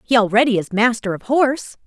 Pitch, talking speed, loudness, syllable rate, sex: 230 Hz, 195 wpm, -17 LUFS, 6.3 syllables/s, female